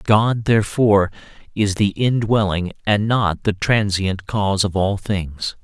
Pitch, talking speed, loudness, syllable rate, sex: 100 Hz, 140 wpm, -19 LUFS, 4.0 syllables/s, male